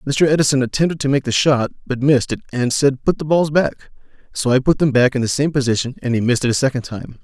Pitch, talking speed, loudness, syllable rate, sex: 135 Hz, 265 wpm, -17 LUFS, 6.5 syllables/s, male